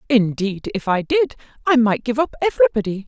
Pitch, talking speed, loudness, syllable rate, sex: 235 Hz, 175 wpm, -19 LUFS, 5.6 syllables/s, female